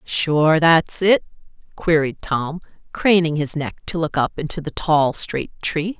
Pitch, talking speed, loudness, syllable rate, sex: 160 Hz, 160 wpm, -19 LUFS, 3.8 syllables/s, female